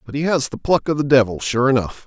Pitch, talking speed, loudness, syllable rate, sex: 135 Hz, 290 wpm, -18 LUFS, 6.2 syllables/s, male